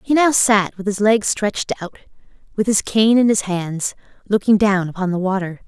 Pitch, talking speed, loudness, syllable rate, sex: 205 Hz, 200 wpm, -18 LUFS, 5.0 syllables/s, female